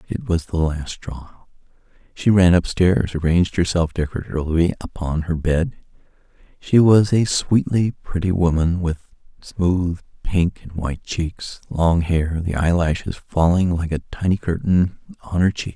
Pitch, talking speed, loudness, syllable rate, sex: 90 Hz, 140 wpm, -20 LUFS, 4.4 syllables/s, male